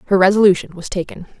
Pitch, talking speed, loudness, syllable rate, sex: 190 Hz, 170 wpm, -16 LUFS, 7.3 syllables/s, female